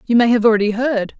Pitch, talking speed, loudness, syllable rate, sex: 225 Hz, 250 wpm, -15 LUFS, 6.4 syllables/s, female